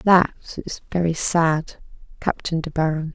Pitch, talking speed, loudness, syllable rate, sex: 165 Hz, 135 wpm, -22 LUFS, 3.9 syllables/s, female